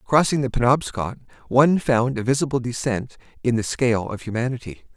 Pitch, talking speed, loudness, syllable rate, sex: 125 Hz, 155 wpm, -22 LUFS, 5.7 syllables/s, male